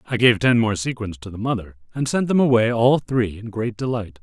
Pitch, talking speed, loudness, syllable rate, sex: 115 Hz, 240 wpm, -20 LUFS, 5.5 syllables/s, male